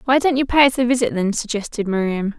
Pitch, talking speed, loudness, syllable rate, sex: 235 Hz, 250 wpm, -18 LUFS, 6.2 syllables/s, female